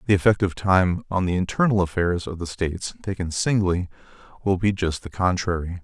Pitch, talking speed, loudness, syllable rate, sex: 90 Hz, 185 wpm, -23 LUFS, 5.4 syllables/s, male